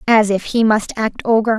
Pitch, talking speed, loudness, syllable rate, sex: 220 Hz, 230 wpm, -16 LUFS, 4.9 syllables/s, female